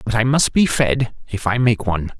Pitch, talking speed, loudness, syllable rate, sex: 115 Hz, 245 wpm, -18 LUFS, 5.2 syllables/s, male